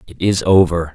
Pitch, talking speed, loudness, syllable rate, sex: 90 Hz, 190 wpm, -15 LUFS, 5.5 syllables/s, male